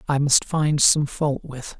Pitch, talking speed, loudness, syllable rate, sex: 145 Hz, 200 wpm, -20 LUFS, 3.8 syllables/s, male